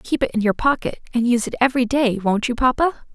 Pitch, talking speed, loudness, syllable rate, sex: 250 Hz, 250 wpm, -20 LUFS, 6.8 syllables/s, female